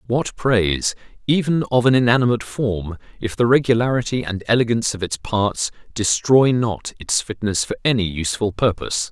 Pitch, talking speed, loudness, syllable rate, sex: 115 Hz, 150 wpm, -19 LUFS, 5.4 syllables/s, male